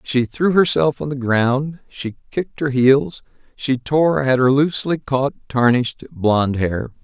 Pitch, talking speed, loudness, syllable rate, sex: 135 Hz, 160 wpm, -18 LUFS, 4.2 syllables/s, male